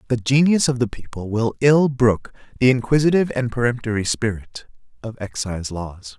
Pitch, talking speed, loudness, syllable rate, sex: 120 Hz, 155 wpm, -20 LUFS, 5.3 syllables/s, male